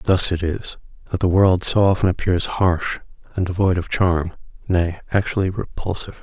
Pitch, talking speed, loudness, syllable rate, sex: 90 Hz, 165 wpm, -20 LUFS, 5.0 syllables/s, male